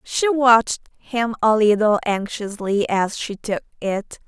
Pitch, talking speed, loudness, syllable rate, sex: 220 Hz, 140 wpm, -20 LUFS, 3.8 syllables/s, female